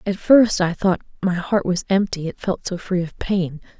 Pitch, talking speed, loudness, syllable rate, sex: 185 Hz, 205 wpm, -20 LUFS, 4.6 syllables/s, female